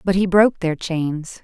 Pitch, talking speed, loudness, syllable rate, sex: 175 Hz, 210 wpm, -19 LUFS, 4.5 syllables/s, female